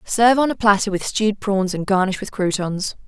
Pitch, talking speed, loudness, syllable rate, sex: 205 Hz, 215 wpm, -19 LUFS, 5.5 syllables/s, female